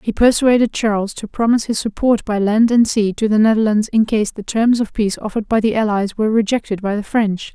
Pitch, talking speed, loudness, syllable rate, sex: 215 Hz, 230 wpm, -16 LUFS, 5.9 syllables/s, female